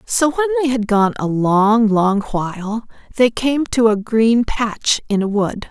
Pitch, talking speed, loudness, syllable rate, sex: 225 Hz, 190 wpm, -17 LUFS, 3.9 syllables/s, female